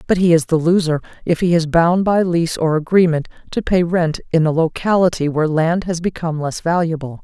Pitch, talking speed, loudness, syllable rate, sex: 165 Hz, 205 wpm, -17 LUFS, 5.7 syllables/s, female